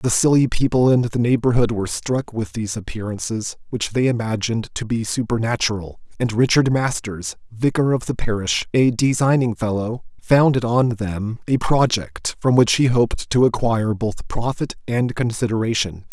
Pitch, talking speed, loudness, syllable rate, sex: 120 Hz, 155 wpm, -20 LUFS, 5.0 syllables/s, male